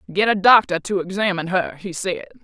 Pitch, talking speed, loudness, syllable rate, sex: 190 Hz, 195 wpm, -19 LUFS, 6.0 syllables/s, female